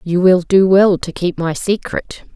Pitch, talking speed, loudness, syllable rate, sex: 180 Hz, 205 wpm, -15 LUFS, 4.2 syllables/s, female